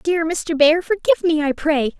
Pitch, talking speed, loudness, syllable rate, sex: 310 Hz, 210 wpm, -18 LUFS, 4.8 syllables/s, female